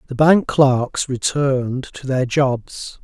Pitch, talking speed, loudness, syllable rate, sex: 135 Hz, 140 wpm, -18 LUFS, 3.2 syllables/s, male